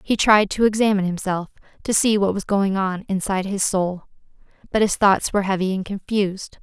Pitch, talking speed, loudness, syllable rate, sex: 195 Hz, 190 wpm, -20 LUFS, 5.6 syllables/s, female